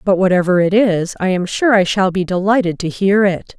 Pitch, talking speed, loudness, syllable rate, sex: 190 Hz, 235 wpm, -15 LUFS, 5.2 syllables/s, female